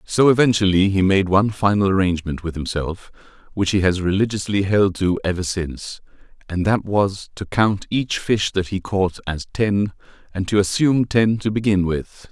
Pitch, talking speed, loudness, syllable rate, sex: 100 Hz, 175 wpm, -19 LUFS, 5.0 syllables/s, male